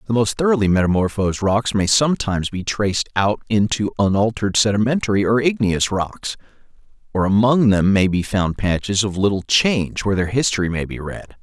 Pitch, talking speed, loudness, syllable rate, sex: 105 Hz, 165 wpm, -18 LUFS, 5.7 syllables/s, male